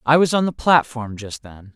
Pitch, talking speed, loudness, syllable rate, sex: 130 Hz, 240 wpm, -18 LUFS, 4.9 syllables/s, male